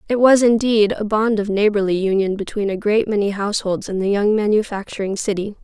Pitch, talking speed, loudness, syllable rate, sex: 205 Hz, 190 wpm, -18 LUFS, 5.8 syllables/s, female